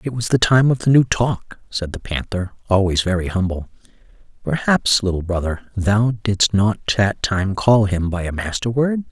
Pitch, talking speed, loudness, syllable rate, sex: 105 Hz, 180 wpm, -19 LUFS, 4.4 syllables/s, male